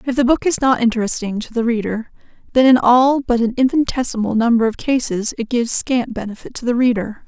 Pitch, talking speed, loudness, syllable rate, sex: 240 Hz, 205 wpm, -17 LUFS, 6.0 syllables/s, female